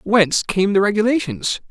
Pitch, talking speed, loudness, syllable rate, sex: 200 Hz, 140 wpm, -18 LUFS, 5.0 syllables/s, male